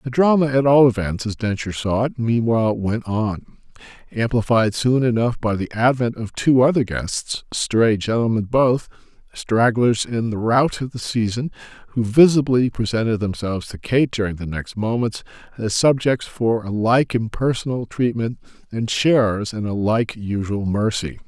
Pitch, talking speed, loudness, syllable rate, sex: 115 Hz, 155 wpm, -20 LUFS, 4.6 syllables/s, male